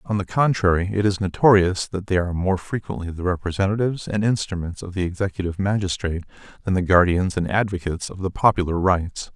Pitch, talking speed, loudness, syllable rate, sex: 95 Hz, 180 wpm, -22 LUFS, 6.3 syllables/s, male